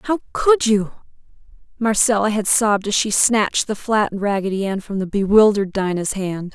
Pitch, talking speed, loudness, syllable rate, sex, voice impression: 205 Hz, 165 wpm, -18 LUFS, 5.3 syllables/s, female, feminine, adult-like, tensed, powerful, slightly soft, clear, intellectual, friendly, reassuring, unique, lively